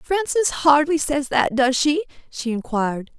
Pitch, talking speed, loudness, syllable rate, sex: 285 Hz, 150 wpm, -20 LUFS, 4.3 syllables/s, female